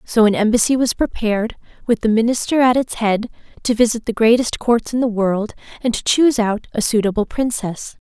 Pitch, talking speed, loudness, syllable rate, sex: 230 Hz, 195 wpm, -17 LUFS, 5.5 syllables/s, female